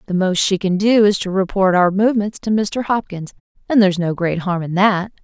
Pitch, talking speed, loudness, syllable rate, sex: 195 Hz, 230 wpm, -17 LUFS, 5.4 syllables/s, female